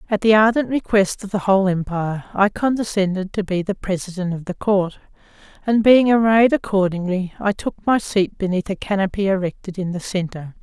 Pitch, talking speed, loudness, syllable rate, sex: 195 Hz, 180 wpm, -19 LUFS, 5.5 syllables/s, female